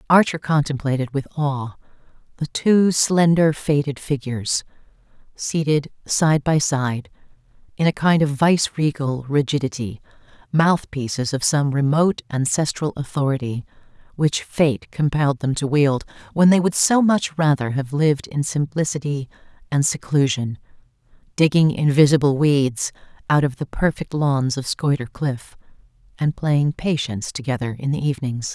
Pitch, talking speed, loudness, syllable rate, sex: 145 Hz, 125 wpm, -20 LUFS, 4.7 syllables/s, female